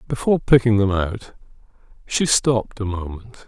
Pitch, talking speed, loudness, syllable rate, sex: 110 Hz, 140 wpm, -19 LUFS, 5.0 syllables/s, male